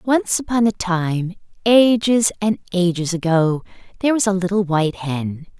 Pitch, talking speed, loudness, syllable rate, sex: 190 Hz, 150 wpm, -18 LUFS, 4.6 syllables/s, female